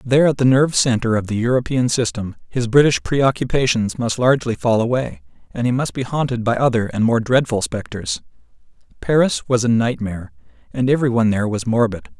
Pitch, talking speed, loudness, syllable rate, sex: 120 Hz, 180 wpm, -18 LUFS, 5.9 syllables/s, male